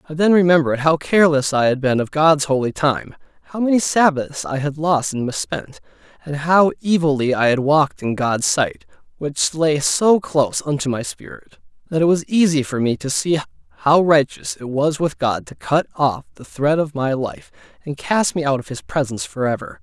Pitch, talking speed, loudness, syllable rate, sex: 150 Hz, 200 wpm, -18 LUFS, 5.1 syllables/s, male